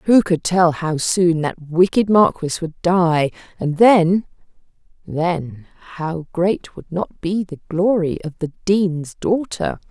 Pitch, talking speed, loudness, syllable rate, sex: 175 Hz, 140 wpm, -18 LUFS, 3.4 syllables/s, female